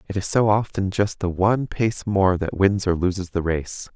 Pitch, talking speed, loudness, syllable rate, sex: 95 Hz, 225 wpm, -22 LUFS, 4.8 syllables/s, male